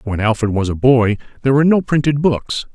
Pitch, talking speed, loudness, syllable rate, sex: 125 Hz, 220 wpm, -16 LUFS, 6.0 syllables/s, male